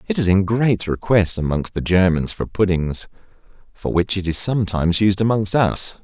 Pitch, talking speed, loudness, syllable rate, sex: 95 Hz, 180 wpm, -18 LUFS, 5.0 syllables/s, male